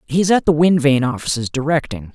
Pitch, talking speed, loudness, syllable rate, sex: 145 Hz, 225 wpm, -16 LUFS, 6.0 syllables/s, male